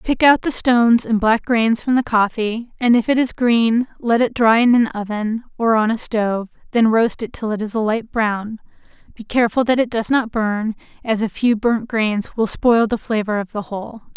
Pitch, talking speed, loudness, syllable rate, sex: 225 Hz, 225 wpm, -18 LUFS, 4.9 syllables/s, female